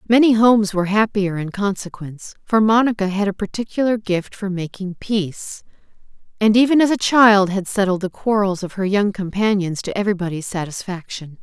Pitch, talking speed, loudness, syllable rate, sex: 200 Hz, 165 wpm, -18 LUFS, 5.5 syllables/s, female